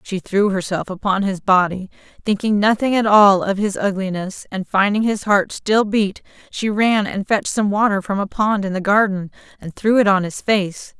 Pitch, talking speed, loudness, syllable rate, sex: 200 Hz, 200 wpm, -18 LUFS, 4.8 syllables/s, female